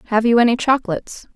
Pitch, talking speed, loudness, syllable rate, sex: 235 Hz, 175 wpm, -17 LUFS, 7.3 syllables/s, female